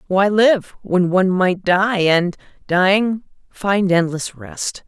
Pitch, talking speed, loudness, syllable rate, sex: 185 Hz, 135 wpm, -17 LUFS, 3.4 syllables/s, female